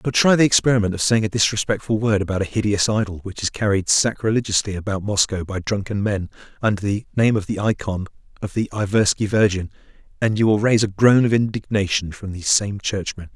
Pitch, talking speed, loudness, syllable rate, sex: 105 Hz, 200 wpm, -20 LUFS, 6.1 syllables/s, male